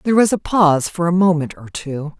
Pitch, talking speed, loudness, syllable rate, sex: 170 Hz, 245 wpm, -17 LUFS, 5.9 syllables/s, female